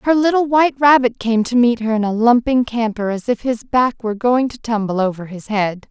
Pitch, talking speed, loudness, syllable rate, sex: 235 Hz, 235 wpm, -17 LUFS, 5.3 syllables/s, female